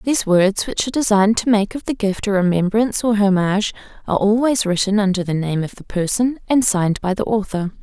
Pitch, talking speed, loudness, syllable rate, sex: 205 Hz, 215 wpm, -18 LUFS, 6.1 syllables/s, female